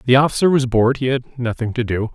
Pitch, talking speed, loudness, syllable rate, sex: 125 Hz, 250 wpm, -18 LUFS, 6.6 syllables/s, male